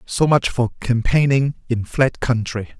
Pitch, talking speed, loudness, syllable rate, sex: 125 Hz, 150 wpm, -19 LUFS, 4.2 syllables/s, male